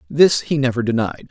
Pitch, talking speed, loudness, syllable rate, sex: 130 Hz, 185 wpm, -17 LUFS, 5.3 syllables/s, male